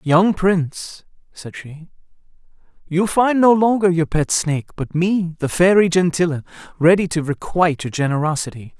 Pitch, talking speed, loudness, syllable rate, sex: 170 Hz, 145 wpm, -18 LUFS, 4.9 syllables/s, male